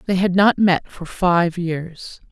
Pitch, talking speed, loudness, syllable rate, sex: 180 Hz, 180 wpm, -18 LUFS, 3.4 syllables/s, female